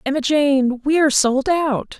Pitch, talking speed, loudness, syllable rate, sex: 275 Hz, 180 wpm, -17 LUFS, 4.3 syllables/s, female